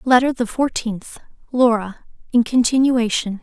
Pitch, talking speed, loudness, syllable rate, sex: 235 Hz, 105 wpm, -18 LUFS, 4.4 syllables/s, female